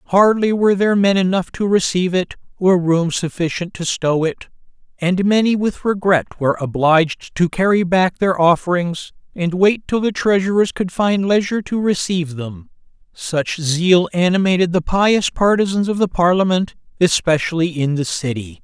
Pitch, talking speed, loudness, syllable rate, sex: 180 Hz, 160 wpm, -17 LUFS, 5.0 syllables/s, male